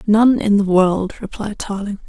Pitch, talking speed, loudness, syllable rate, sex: 205 Hz, 175 wpm, -17 LUFS, 4.4 syllables/s, female